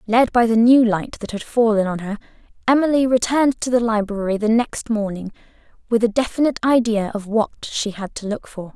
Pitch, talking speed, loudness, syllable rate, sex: 225 Hz, 200 wpm, -19 LUFS, 5.6 syllables/s, female